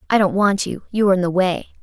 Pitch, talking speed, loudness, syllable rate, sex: 195 Hz, 295 wpm, -18 LUFS, 7.0 syllables/s, female